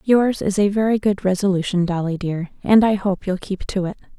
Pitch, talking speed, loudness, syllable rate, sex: 195 Hz, 215 wpm, -20 LUFS, 5.3 syllables/s, female